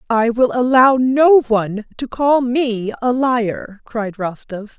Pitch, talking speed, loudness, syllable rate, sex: 240 Hz, 150 wpm, -16 LUFS, 3.4 syllables/s, female